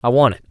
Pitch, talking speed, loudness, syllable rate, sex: 120 Hz, 360 wpm, -16 LUFS, 8.1 syllables/s, male